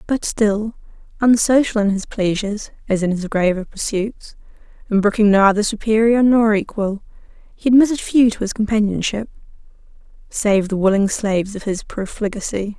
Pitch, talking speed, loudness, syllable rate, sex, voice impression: 210 Hz, 140 wpm, -18 LUFS, 5.1 syllables/s, female, very feminine, middle-aged, very thin, relaxed, slightly weak, slightly dark, very soft, clear, fluent, slightly raspy, very cute, intellectual, refreshing, very sincere, calm, friendly, reassuring, slightly unique, slightly elegant, slightly wild, sweet, lively, kind, intense